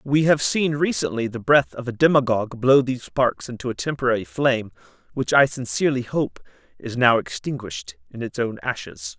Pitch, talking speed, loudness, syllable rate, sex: 125 Hz, 175 wpm, -21 LUFS, 5.5 syllables/s, male